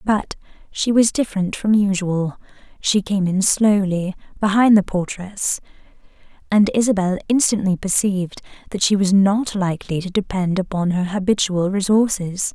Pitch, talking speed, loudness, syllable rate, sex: 195 Hz, 135 wpm, -19 LUFS, 4.8 syllables/s, female